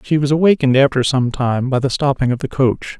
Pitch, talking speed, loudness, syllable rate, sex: 135 Hz, 240 wpm, -16 LUFS, 5.9 syllables/s, male